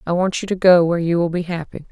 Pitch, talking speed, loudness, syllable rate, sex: 175 Hz, 315 wpm, -18 LUFS, 6.8 syllables/s, female